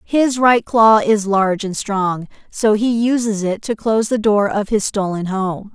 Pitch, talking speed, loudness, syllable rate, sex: 210 Hz, 200 wpm, -16 LUFS, 4.2 syllables/s, female